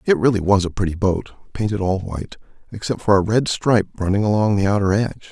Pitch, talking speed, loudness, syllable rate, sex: 100 Hz, 215 wpm, -19 LUFS, 6.7 syllables/s, male